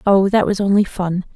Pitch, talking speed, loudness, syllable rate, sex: 195 Hz, 220 wpm, -17 LUFS, 5.1 syllables/s, female